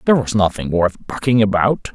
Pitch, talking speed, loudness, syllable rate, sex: 105 Hz, 185 wpm, -17 LUFS, 5.6 syllables/s, male